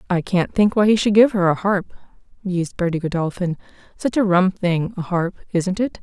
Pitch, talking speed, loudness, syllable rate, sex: 185 Hz, 210 wpm, -19 LUFS, 5.4 syllables/s, female